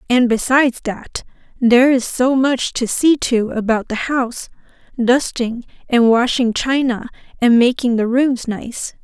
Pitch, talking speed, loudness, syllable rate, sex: 245 Hz, 140 wpm, -16 LUFS, 4.3 syllables/s, female